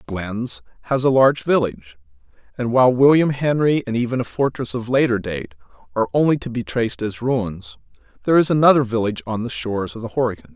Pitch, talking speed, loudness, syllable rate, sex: 120 Hz, 190 wpm, -19 LUFS, 6.2 syllables/s, male